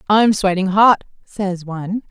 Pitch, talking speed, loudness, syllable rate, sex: 195 Hz, 140 wpm, -17 LUFS, 4.2 syllables/s, female